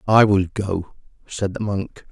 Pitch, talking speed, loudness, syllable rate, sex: 100 Hz, 170 wpm, -21 LUFS, 3.8 syllables/s, male